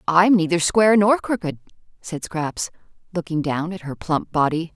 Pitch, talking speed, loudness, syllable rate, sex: 175 Hz, 175 wpm, -21 LUFS, 5.1 syllables/s, female